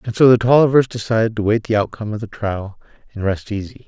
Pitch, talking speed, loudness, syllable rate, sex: 110 Hz, 230 wpm, -18 LUFS, 6.7 syllables/s, male